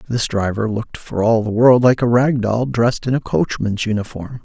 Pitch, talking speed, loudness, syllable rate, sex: 115 Hz, 215 wpm, -17 LUFS, 5.2 syllables/s, male